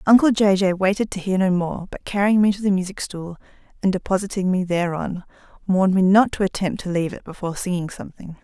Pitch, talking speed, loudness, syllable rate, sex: 190 Hz, 215 wpm, -21 LUFS, 6.2 syllables/s, female